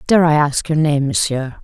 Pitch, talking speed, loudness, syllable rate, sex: 150 Hz, 220 wpm, -16 LUFS, 4.8 syllables/s, female